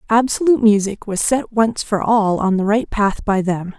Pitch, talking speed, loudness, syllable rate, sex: 210 Hz, 205 wpm, -17 LUFS, 4.7 syllables/s, female